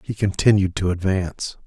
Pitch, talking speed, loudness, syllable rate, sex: 95 Hz, 145 wpm, -21 LUFS, 5.4 syllables/s, male